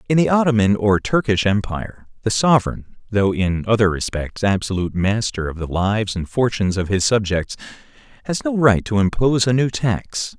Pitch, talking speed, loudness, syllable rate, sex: 105 Hz, 175 wpm, -19 LUFS, 5.3 syllables/s, male